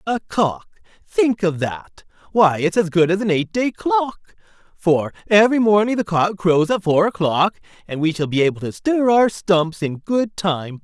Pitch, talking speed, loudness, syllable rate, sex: 185 Hz, 195 wpm, -18 LUFS, 4.4 syllables/s, male